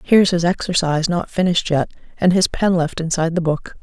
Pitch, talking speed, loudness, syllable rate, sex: 170 Hz, 205 wpm, -18 LUFS, 6.1 syllables/s, female